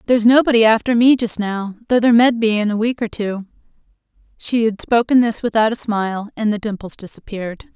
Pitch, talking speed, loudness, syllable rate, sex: 220 Hz, 200 wpm, -17 LUFS, 5.9 syllables/s, female